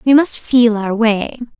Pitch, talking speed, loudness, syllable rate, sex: 235 Hz, 190 wpm, -14 LUFS, 3.8 syllables/s, female